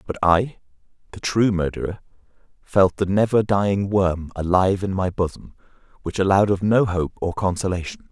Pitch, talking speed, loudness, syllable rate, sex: 95 Hz, 155 wpm, -21 LUFS, 5.3 syllables/s, male